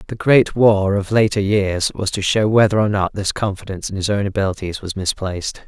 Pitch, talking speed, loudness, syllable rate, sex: 100 Hz, 210 wpm, -18 LUFS, 5.5 syllables/s, male